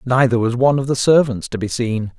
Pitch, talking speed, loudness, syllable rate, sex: 120 Hz, 245 wpm, -17 LUFS, 5.9 syllables/s, male